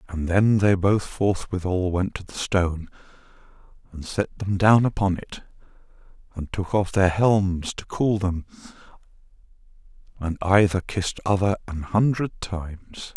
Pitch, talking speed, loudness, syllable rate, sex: 95 Hz, 135 wpm, -23 LUFS, 4.3 syllables/s, male